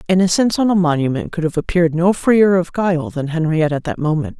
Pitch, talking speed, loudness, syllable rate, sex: 170 Hz, 220 wpm, -16 LUFS, 6.4 syllables/s, female